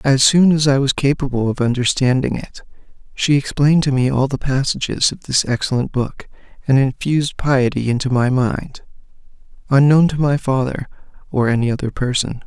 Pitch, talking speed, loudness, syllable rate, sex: 135 Hz, 165 wpm, -17 LUFS, 5.3 syllables/s, male